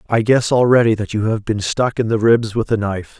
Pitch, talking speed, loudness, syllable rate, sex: 110 Hz, 265 wpm, -16 LUFS, 5.7 syllables/s, male